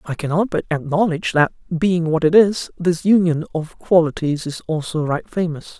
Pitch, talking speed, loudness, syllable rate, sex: 165 Hz, 175 wpm, -19 LUFS, 4.9 syllables/s, male